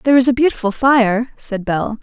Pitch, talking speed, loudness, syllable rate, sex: 235 Hz, 180 wpm, -16 LUFS, 4.9 syllables/s, female